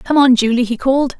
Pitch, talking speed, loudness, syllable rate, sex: 255 Hz, 250 wpm, -14 LUFS, 6.1 syllables/s, female